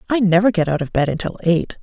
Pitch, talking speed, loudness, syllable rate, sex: 185 Hz, 265 wpm, -18 LUFS, 6.3 syllables/s, female